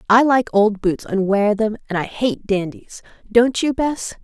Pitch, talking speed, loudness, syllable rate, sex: 220 Hz, 200 wpm, -18 LUFS, 4.2 syllables/s, female